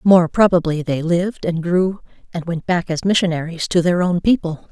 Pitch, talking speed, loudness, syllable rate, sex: 175 Hz, 190 wpm, -18 LUFS, 5.1 syllables/s, female